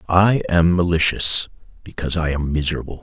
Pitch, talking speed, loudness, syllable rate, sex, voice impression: 85 Hz, 140 wpm, -18 LUFS, 5.6 syllables/s, male, very masculine, very old, very thick, relaxed, slightly weak, dark, very soft, very muffled, slightly halting, very raspy, cool, very intellectual, sincere, very calm, very mature, very friendly, very reassuring, very unique, slightly elegant, very wild, lively, strict, slightly intense, modest